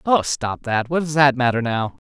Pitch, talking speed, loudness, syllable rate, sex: 130 Hz, 225 wpm, -20 LUFS, 4.8 syllables/s, male